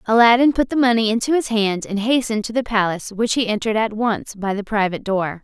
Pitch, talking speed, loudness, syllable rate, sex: 220 Hz, 230 wpm, -19 LUFS, 6.3 syllables/s, female